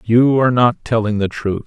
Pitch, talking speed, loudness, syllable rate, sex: 115 Hz, 215 wpm, -16 LUFS, 5.2 syllables/s, male